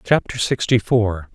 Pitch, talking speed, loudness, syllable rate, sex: 110 Hz, 135 wpm, -19 LUFS, 4.1 syllables/s, male